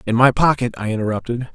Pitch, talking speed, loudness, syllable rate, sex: 120 Hz, 195 wpm, -18 LUFS, 6.6 syllables/s, male